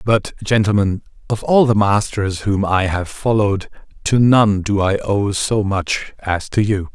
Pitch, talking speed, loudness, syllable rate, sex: 105 Hz, 175 wpm, -17 LUFS, 4.1 syllables/s, male